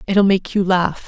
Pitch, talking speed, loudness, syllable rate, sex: 190 Hz, 225 wpm, -17 LUFS, 4.4 syllables/s, female